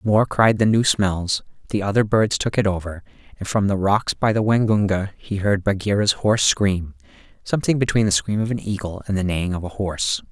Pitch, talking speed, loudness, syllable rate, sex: 100 Hz, 205 wpm, -20 LUFS, 5.5 syllables/s, male